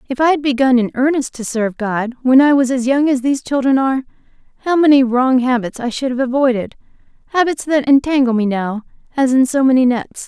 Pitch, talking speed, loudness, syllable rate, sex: 260 Hz, 210 wpm, -15 LUFS, 5.9 syllables/s, female